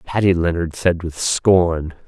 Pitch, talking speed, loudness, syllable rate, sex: 85 Hz, 145 wpm, -18 LUFS, 3.7 syllables/s, male